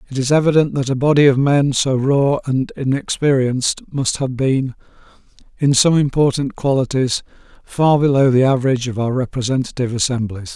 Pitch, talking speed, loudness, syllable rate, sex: 135 Hz, 155 wpm, -17 LUFS, 5.5 syllables/s, male